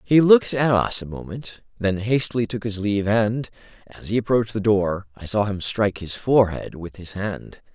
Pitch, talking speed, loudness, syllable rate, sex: 105 Hz, 200 wpm, -22 LUFS, 5.3 syllables/s, male